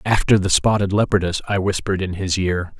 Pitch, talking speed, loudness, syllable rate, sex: 95 Hz, 195 wpm, -19 LUFS, 5.8 syllables/s, male